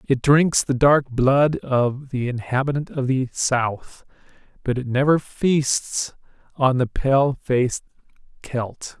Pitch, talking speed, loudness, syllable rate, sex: 130 Hz, 135 wpm, -21 LUFS, 3.5 syllables/s, male